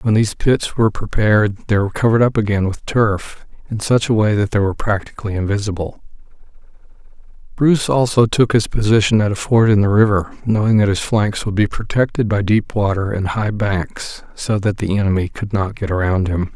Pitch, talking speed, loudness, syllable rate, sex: 105 Hz, 195 wpm, -17 LUFS, 5.6 syllables/s, male